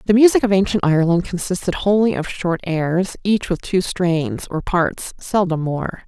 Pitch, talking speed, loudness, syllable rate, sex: 180 Hz, 170 wpm, -19 LUFS, 4.6 syllables/s, female